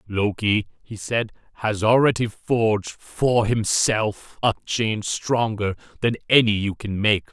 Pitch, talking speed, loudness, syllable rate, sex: 110 Hz, 130 wpm, -22 LUFS, 3.8 syllables/s, male